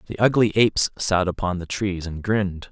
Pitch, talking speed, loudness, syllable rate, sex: 95 Hz, 200 wpm, -22 LUFS, 4.9 syllables/s, male